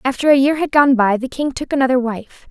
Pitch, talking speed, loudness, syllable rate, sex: 265 Hz, 265 wpm, -16 LUFS, 5.8 syllables/s, female